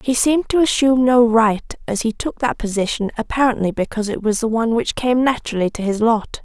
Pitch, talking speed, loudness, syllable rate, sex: 230 Hz, 215 wpm, -18 LUFS, 6.0 syllables/s, female